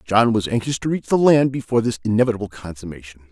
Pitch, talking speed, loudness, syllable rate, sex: 110 Hz, 200 wpm, -19 LUFS, 6.8 syllables/s, male